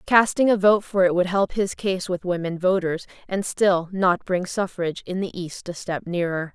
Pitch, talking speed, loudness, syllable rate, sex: 185 Hz, 210 wpm, -23 LUFS, 4.7 syllables/s, female